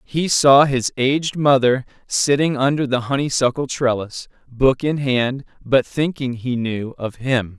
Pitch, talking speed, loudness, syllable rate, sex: 130 Hz, 150 wpm, -18 LUFS, 4.1 syllables/s, male